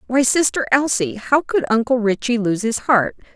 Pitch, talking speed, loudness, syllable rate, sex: 235 Hz, 180 wpm, -18 LUFS, 4.7 syllables/s, female